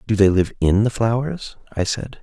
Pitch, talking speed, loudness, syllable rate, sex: 110 Hz, 215 wpm, -19 LUFS, 4.8 syllables/s, male